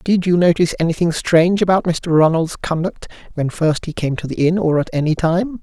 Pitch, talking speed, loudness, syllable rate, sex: 170 Hz, 215 wpm, -17 LUFS, 5.5 syllables/s, male